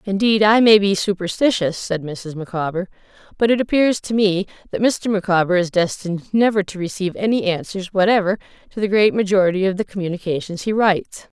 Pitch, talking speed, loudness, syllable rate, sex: 195 Hz, 175 wpm, -18 LUFS, 5.8 syllables/s, female